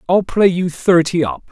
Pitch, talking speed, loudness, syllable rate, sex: 170 Hz, 200 wpm, -15 LUFS, 4.5 syllables/s, male